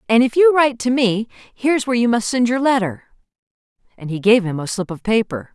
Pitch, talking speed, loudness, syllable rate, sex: 230 Hz, 225 wpm, -17 LUFS, 5.9 syllables/s, female